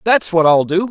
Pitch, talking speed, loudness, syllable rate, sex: 185 Hz, 265 wpm, -13 LUFS, 5.1 syllables/s, male